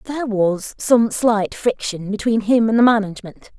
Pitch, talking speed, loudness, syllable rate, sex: 220 Hz, 170 wpm, -18 LUFS, 4.8 syllables/s, female